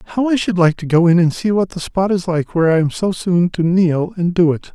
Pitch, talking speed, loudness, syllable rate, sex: 175 Hz, 305 wpm, -16 LUFS, 5.7 syllables/s, male